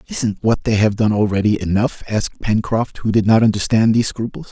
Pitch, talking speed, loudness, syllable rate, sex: 110 Hz, 200 wpm, -17 LUFS, 5.5 syllables/s, male